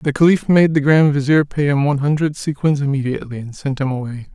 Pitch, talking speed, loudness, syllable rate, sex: 145 Hz, 220 wpm, -17 LUFS, 6.1 syllables/s, male